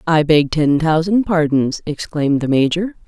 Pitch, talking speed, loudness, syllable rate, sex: 160 Hz, 155 wpm, -16 LUFS, 4.6 syllables/s, female